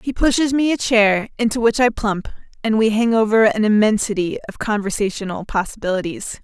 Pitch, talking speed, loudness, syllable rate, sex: 220 Hz, 170 wpm, -18 LUFS, 5.5 syllables/s, female